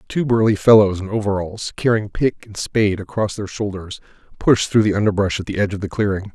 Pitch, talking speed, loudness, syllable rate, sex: 100 Hz, 210 wpm, -19 LUFS, 5.9 syllables/s, male